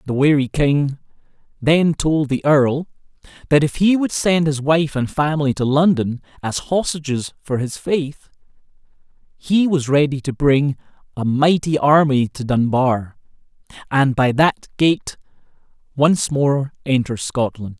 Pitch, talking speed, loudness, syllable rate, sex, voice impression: 140 Hz, 140 wpm, -18 LUFS, 4.1 syllables/s, male, masculine, adult-like, slightly clear, friendly, slightly unique